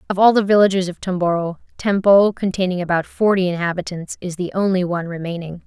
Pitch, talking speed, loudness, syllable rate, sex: 185 Hz, 170 wpm, -18 LUFS, 6.1 syllables/s, female